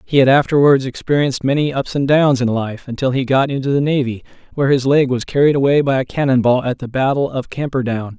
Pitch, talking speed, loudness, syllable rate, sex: 135 Hz, 225 wpm, -16 LUFS, 6.1 syllables/s, male